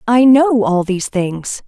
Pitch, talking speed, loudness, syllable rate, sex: 220 Hz, 180 wpm, -14 LUFS, 4.0 syllables/s, female